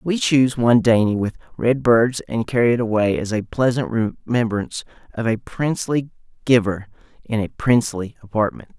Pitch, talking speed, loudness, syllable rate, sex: 115 Hz, 155 wpm, -20 LUFS, 5.6 syllables/s, male